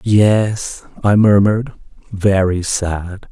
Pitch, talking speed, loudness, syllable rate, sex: 100 Hz, 90 wpm, -15 LUFS, 3.0 syllables/s, male